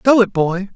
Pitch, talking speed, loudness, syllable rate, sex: 205 Hz, 240 wpm, -16 LUFS, 4.8 syllables/s, male